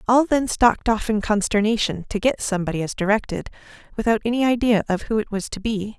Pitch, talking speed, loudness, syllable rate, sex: 215 Hz, 200 wpm, -21 LUFS, 6.1 syllables/s, female